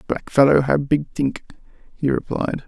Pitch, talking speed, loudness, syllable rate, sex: 140 Hz, 155 wpm, -20 LUFS, 4.8 syllables/s, male